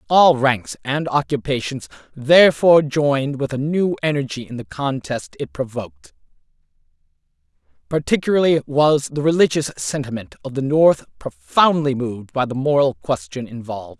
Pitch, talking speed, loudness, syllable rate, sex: 140 Hz, 130 wpm, -19 LUFS, 5.0 syllables/s, male